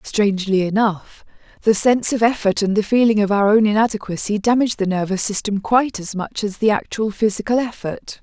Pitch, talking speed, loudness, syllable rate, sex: 210 Hz, 180 wpm, -18 LUFS, 5.7 syllables/s, female